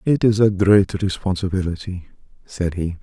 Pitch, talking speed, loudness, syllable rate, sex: 95 Hz, 140 wpm, -19 LUFS, 4.8 syllables/s, male